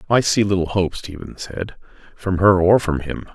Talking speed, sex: 195 wpm, male